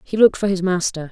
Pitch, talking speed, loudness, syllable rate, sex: 185 Hz, 270 wpm, -18 LUFS, 6.9 syllables/s, female